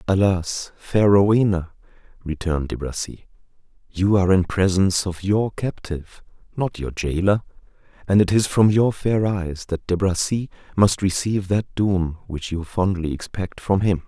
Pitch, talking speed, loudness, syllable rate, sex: 95 Hz, 155 wpm, -21 LUFS, 4.7 syllables/s, male